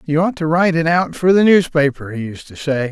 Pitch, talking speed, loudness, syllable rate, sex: 160 Hz, 270 wpm, -16 LUFS, 5.7 syllables/s, male